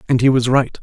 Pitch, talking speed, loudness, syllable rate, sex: 125 Hz, 290 wpm, -15 LUFS, 6.3 syllables/s, male